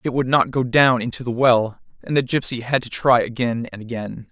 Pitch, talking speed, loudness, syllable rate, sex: 125 Hz, 235 wpm, -20 LUFS, 5.3 syllables/s, male